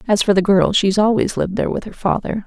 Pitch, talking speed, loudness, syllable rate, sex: 200 Hz, 270 wpm, -17 LUFS, 6.4 syllables/s, female